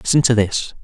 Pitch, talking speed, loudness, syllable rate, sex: 115 Hz, 215 wpm, -17 LUFS, 5.4 syllables/s, male